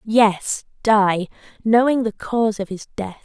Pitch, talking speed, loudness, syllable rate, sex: 210 Hz, 150 wpm, -19 LUFS, 4.0 syllables/s, female